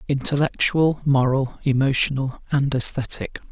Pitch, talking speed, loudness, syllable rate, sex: 135 Hz, 85 wpm, -20 LUFS, 4.6 syllables/s, male